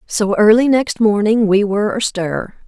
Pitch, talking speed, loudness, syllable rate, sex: 215 Hz, 155 wpm, -15 LUFS, 4.5 syllables/s, female